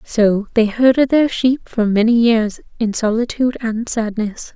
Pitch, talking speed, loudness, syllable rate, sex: 230 Hz, 160 wpm, -16 LUFS, 4.3 syllables/s, female